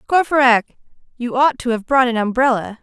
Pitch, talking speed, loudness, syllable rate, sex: 245 Hz, 170 wpm, -16 LUFS, 5.4 syllables/s, female